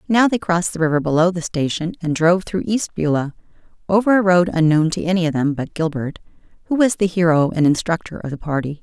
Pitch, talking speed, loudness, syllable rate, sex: 170 Hz, 215 wpm, -18 LUFS, 6.1 syllables/s, female